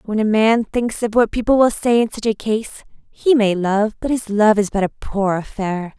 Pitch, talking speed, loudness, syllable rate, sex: 215 Hz, 240 wpm, -18 LUFS, 4.7 syllables/s, female